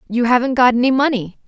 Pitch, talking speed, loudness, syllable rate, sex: 245 Hz, 205 wpm, -15 LUFS, 6.5 syllables/s, female